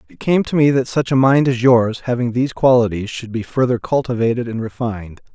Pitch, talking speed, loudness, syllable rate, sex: 120 Hz, 215 wpm, -17 LUFS, 5.8 syllables/s, male